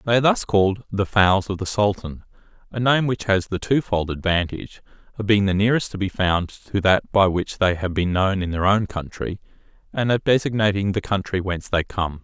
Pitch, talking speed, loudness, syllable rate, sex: 100 Hz, 210 wpm, -21 LUFS, 5.4 syllables/s, male